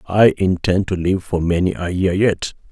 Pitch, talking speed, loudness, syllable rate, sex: 90 Hz, 200 wpm, -18 LUFS, 4.5 syllables/s, male